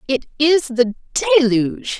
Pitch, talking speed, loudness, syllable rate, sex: 265 Hz, 120 wpm, -17 LUFS, 3.9 syllables/s, female